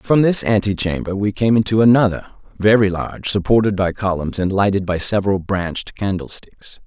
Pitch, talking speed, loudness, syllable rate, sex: 100 Hz, 155 wpm, -17 LUFS, 5.3 syllables/s, male